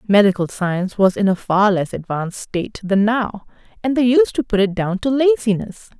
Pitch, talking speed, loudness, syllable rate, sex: 210 Hz, 200 wpm, -18 LUFS, 5.2 syllables/s, female